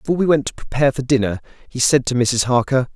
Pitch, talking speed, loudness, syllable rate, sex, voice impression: 130 Hz, 245 wpm, -18 LUFS, 7.1 syllables/s, male, masculine, adult-like, tensed, powerful, bright, clear, fluent, cool, friendly, wild, lively, slightly intense